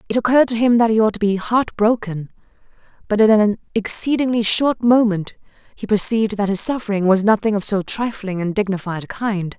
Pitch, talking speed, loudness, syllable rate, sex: 210 Hz, 195 wpm, -17 LUFS, 5.7 syllables/s, female